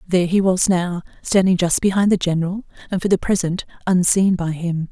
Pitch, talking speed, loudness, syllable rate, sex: 180 Hz, 195 wpm, -19 LUFS, 5.6 syllables/s, female